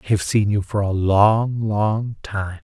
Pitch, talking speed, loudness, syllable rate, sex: 105 Hz, 200 wpm, -20 LUFS, 3.5 syllables/s, male